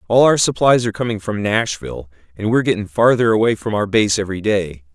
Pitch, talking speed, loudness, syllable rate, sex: 105 Hz, 220 wpm, -17 LUFS, 6.6 syllables/s, male